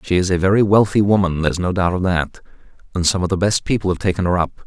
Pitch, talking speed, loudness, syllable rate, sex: 95 Hz, 270 wpm, -17 LUFS, 6.9 syllables/s, male